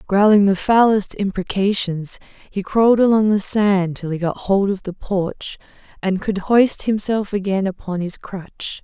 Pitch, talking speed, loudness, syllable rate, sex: 200 Hz, 165 wpm, -18 LUFS, 4.3 syllables/s, female